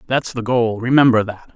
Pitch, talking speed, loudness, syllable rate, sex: 120 Hz, 195 wpm, -16 LUFS, 5.1 syllables/s, male